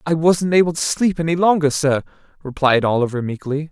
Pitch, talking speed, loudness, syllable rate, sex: 155 Hz, 180 wpm, -18 LUFS, 5.7 syllables/s, male